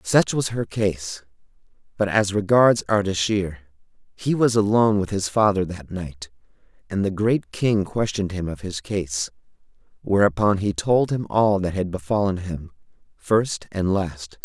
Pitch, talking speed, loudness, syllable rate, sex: 100 Hz, 155 wpm, -22 LUFS, 4.4 syllables/s, male